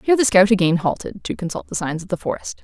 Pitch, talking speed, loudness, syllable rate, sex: 195 Hz, 275 wpm, -19 LUFS, 6.8 syllables/s, female